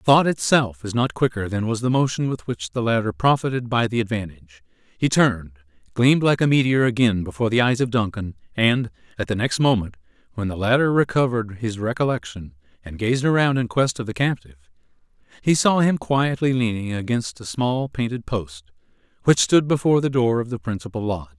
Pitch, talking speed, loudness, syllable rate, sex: 115 Hz, 190 wpm, -21 LUFS, 5.7 syllables/s, male